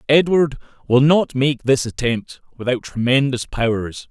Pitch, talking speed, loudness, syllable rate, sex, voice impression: 130 Hz, 130 wpm, -18 LUFS, 4.3 syllables/s, male, masculine, adult-like, slightly clear, friendly, slightly unique